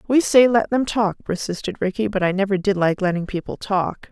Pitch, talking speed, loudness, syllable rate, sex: 200 Hz, 220 wpm, -20 LUFS, 5.5 syllables/s, female